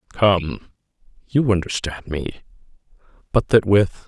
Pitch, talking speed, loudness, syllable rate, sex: 95 Hz, 90 wpm, -20 LUFS, 3.7 syllables/s, male